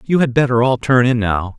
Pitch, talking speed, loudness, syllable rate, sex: 125 Hz, 265 wpm, -15 LUFS, 5.4 syllables/s, male